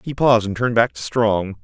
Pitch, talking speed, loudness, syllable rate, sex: 110 Hz, 260 wpm, -18 LUFS, 5.9 syllables/s, male